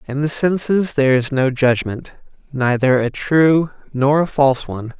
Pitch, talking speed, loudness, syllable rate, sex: 140 Hz, 155 wpm, -17 LUFS, 4.9 syllables/s, male